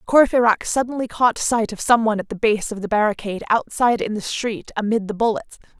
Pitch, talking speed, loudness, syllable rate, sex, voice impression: 220 Hz, 205 wpm, -20 LUFS, 6.0 syllables/s, female, very feminine, slightly young, thin, tensed, very powerful, bright, slightly soft, clear, very fluent, raspy, cool, slightly intellectual, very refreshing, slightly sincere, slightly calm, slightly friendly, slightly reassuring, very unique, slightly elegant, wild, slightly sweet, very lively, slightly strict, intense, sharp, light